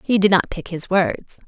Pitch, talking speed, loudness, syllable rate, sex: 185 Hz, 245 wpm, -19 LUFS, 4.7 syllables/s, female